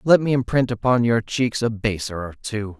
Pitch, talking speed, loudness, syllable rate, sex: 115 Hz, 215 wpm, -21 LUFS, 5.0 syllables/s, male